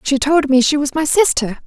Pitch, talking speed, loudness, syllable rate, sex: 285 Hz, 255 wpm, -15 LUFS, 5.2 syllables/s, female